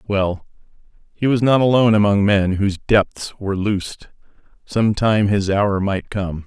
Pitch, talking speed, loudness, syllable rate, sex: 100 Hz, 160 wpm, -18 LUFS, 4.6 syllables/s, male